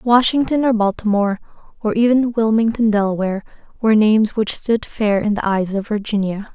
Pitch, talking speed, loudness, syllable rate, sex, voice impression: 215 Hz, 155 wpm, -17 LUFS, 5.6 syllables/s, female, feminine, slightly adult-like, slightly cute, slightly calm, slightly friendly, slightly kind